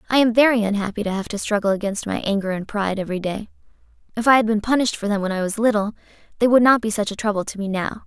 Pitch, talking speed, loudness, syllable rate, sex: 210 Hz, 270 wpm, -20 LUFS, 7.3 syllables/s, female